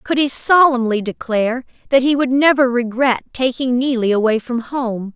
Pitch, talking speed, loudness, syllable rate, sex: 250 Hz, 165 wpm, -16 LUFS, 5.0 syllables/s, female